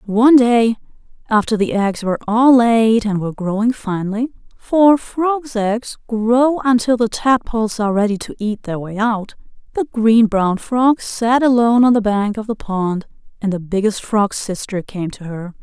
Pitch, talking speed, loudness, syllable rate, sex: 220 Hz, 175 wpm, -16 LUFS, 3.5 syllables/s, female